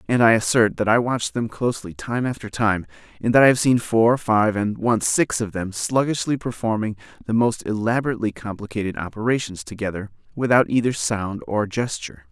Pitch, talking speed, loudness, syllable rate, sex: 110 Hz, 175 wpm, -21 LUFS, 5.7 syllables/s, male